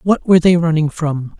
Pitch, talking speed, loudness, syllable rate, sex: 165 Hz, 215 wpm, -14 LUFS, 5.5 syllables/s, male